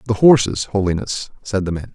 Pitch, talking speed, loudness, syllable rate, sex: 105 Hz, 185 wpm, -18 LUFS, 5.4 syllables/s, male